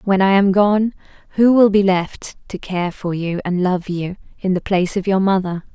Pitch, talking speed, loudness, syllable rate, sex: 190 Hz, 220 wpm, -17 LUFS, 4.8 syllables/s, female